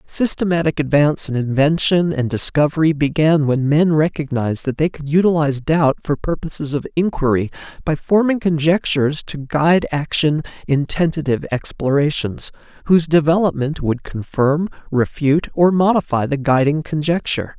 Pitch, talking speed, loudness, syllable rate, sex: 150 Hz, 130 wpm, -17 LUFS, 5.2 syllables/s, male